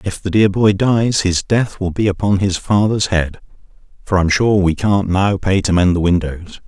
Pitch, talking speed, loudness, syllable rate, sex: 95 Hz, 205 wpm, -15 LUFS, 4.4 syllables/s, male